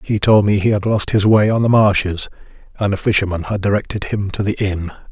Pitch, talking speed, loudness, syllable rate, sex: 100 Hz, 235 wpm, -16 LUFS, 5.7 syllables/s, male